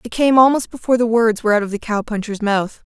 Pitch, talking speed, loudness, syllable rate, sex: 225 Hz, 250 wpm, -17 LUFS, 6.6 syllables/s, female